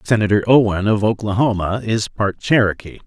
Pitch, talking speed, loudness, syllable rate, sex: 105 Hz, 135 wpm, -17 LUFS, 5.2 syllables/s, male